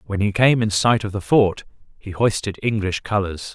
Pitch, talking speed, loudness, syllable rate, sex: 105 Hz, 205 wpm, -20 LUFS, 4.9 syllables/s, male